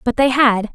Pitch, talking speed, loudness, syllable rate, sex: 245 Hz, 240 wpm, -15 LUFS, 4.8 syllables/s, female